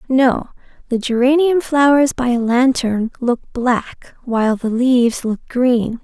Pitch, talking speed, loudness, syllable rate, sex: 250 Hz, 140 wpm, -16 LUFS, 4.2 syllables/s, female